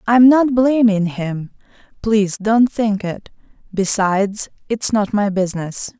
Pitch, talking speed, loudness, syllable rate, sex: 210 Hz, 140 wpm, -17 LUFS, 4.3 syllables/s, female